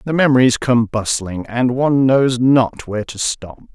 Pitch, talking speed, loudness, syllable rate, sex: 125 Hz, 175 wpm, -16 LUFS, 4.5 syllables/s, male